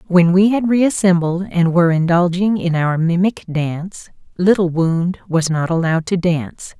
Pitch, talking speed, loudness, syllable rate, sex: 175 Hz, 160 wpm, -16 LUFS, 4.7 syllables/s, female